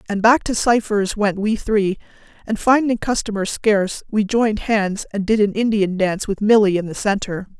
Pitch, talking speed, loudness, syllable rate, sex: 210 Hz, 190 wpm, -18 LUFS, 5.1 syllables/s, female